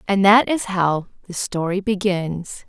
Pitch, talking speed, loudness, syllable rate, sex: 190 Hz, 155 wpm, -20 LUFS, 3.9 syllables/s, female